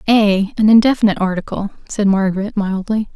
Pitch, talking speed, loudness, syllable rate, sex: 205 Hz, 135 wpm, -16 LUFS, 5.9 syllables/s, female